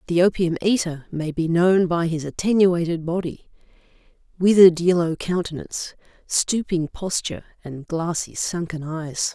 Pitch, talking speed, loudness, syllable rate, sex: 170 Hz, 120 wpm, -21 LUFS, 4.7 syllables/s, female